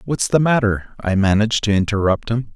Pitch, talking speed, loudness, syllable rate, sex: 110 Hz, 190 wpm, -18 LUFS, 5.5 syllables/s, male